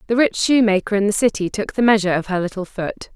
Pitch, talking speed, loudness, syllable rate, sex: 210 Hz, 245 wpm, -18 LUFS, 6.5 syllables/s, female